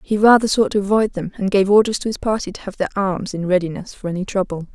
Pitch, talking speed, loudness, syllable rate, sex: 195 Hz, 265 wpm, -19 LUFS, 6.5 syllables/s, female